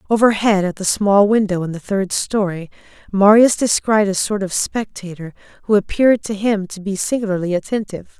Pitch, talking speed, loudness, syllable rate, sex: 200 Hz, 170 wpm, -17 LUFS, 5.4 syllables/s, female